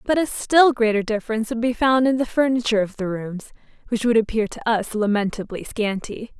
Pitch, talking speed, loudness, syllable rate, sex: 225 Hz, 195 wpm, -21 LUFS, 5.7 syllables/s, female